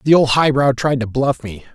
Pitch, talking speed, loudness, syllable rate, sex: 130 Hz, 275 wpm, -16 LUFS, 5.2 syllables/s, male